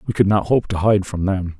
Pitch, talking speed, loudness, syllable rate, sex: 100 Hz, 300 wpm, -18 LUFS, 5.6 syllables/s, male